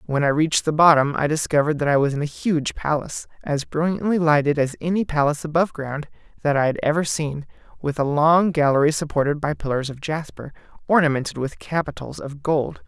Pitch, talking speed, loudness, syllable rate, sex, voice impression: 150 Hz, 190 wpm, -21 LUFS, 5.9 syllables/s, male, masculine, slightly adult-like, slightly clear, refreshing, sincere, friendly